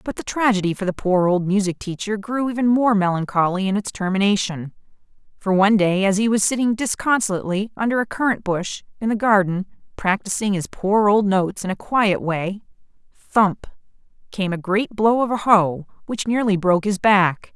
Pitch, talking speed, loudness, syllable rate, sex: 200 Hz, 180 wpm, -20 LUFS, 5.3 syllables/s, female